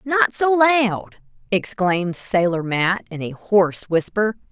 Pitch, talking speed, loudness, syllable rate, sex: 205 Hz, 135 wpm, -19 LUFS, 3.8 syllables/s, female